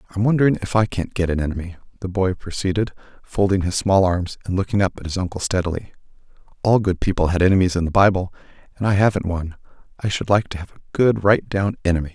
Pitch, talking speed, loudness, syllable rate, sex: 95 Hz, 215 wpm, -20 LUFS, 6.6 syllables/s, male